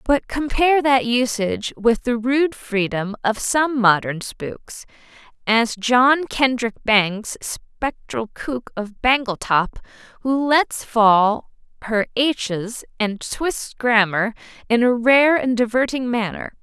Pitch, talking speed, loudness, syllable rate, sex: 235 Hz, 125 wpm, -19 LUFS, 3.4 syllables/s, female